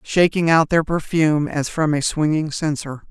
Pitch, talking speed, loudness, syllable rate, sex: 155 Hz, 175 wpm, -19 LUFS, 4.4 syllables/s, female